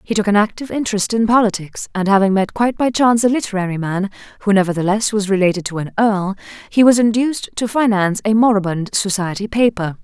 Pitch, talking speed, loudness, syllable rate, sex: 205 Hz, 180 wpm, -16 LUFS, 6.4 syllables/s, female